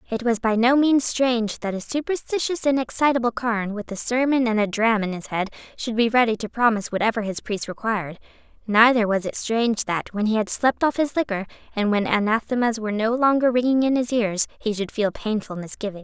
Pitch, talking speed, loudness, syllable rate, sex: 230 Hz, 215 wpm, -22 LUFS, 5.8 syllables/s, female